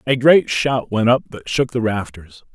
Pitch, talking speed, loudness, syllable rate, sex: 120 Hz, 210 wpm, -17 LUFS, 4.5 syllables/s, male